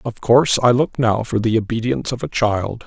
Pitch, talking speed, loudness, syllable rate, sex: 115 Hz, 230 wpm, -18 LUFS, 5.5 syllables/s, male